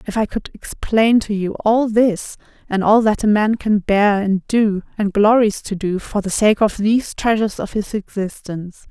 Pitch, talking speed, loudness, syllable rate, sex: 210 Hz, 200 wpm, -17 LUFS, 4.6 syllables/s, female